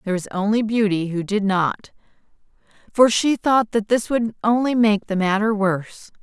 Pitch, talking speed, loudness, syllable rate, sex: 210 Hz, 175 wpm, -20 LUFS, 4.9 syllables/s, female